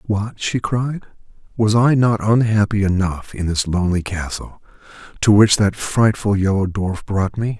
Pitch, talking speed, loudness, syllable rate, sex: 105 Hz, 160 wpm, -18 LUFS, 4.5 syllables/s, male